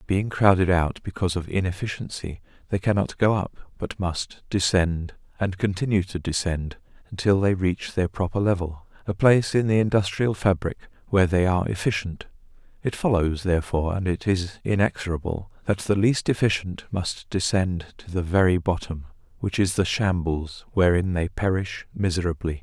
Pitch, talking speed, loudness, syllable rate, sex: 95 Hz, 155 wpm, -24 LUFS, 5.1 syllables/s, male